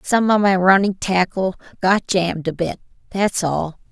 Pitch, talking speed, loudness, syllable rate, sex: 185 Hz, 170 wpm, -18 LUFS, 4.5 syllables/s, female